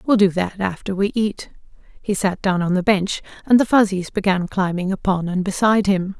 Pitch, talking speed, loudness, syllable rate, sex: 195 Hz, 205 wpm, -19 LUFS, 5.2 syllables/s, female